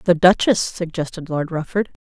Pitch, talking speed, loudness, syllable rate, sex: 170 Hz, 150 wpm, -19 LUFS, 4.7 syllables/s, female